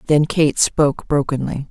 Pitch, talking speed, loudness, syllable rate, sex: 145 Hz, 140 wpm, -17 LUFS, 4.6 syllables/s, female